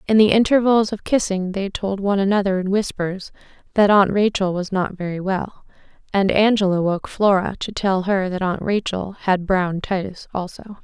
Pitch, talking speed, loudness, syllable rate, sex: 195 Hz, 175 wpm, -20 LUFS, 4.9 syllables/s, female